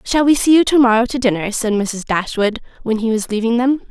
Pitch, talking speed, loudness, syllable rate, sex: 235 Hz, 230 wpm, -16 LUFS, 5.7 syllables/s, female